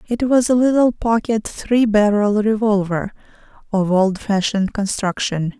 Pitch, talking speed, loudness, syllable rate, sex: 210 Hz, 120 wpm, -18 LUFS, 4.3 syllables/s, female